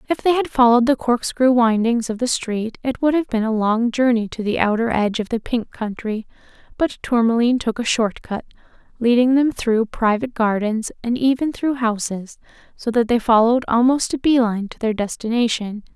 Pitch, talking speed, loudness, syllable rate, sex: 235 Hz, 190 wpm, -19 LUFS, 5.3 syllables/s, female